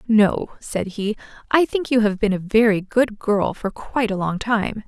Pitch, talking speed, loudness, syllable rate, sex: 215 Hz, 210 wpm, -20 LUFS, 4.4 syllables/s, female